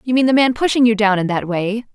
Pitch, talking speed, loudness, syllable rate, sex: 225 Hz, 310 wpm, -16 LUFS, 6.2 syllables/s, female